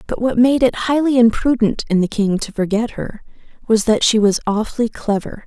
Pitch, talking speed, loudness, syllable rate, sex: 225 Hz, 185 wpm, -17 LUFS, 5.2 syllables/s, female